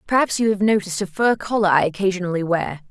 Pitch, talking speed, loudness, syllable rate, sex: 195 Hz, 205 wpm, -20 LUFS, 6.6 syllables/s, female